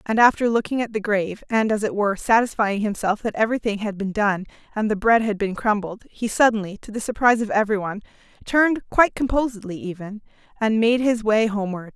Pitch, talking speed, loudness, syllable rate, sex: 215 Hz, 200 wpm, -21 LUFS, 6.3 syllables/s, female